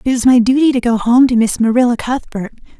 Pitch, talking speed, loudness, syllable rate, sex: 240 Hz, 260 wpm, -13 LUFS, 6.6 syllables/s, female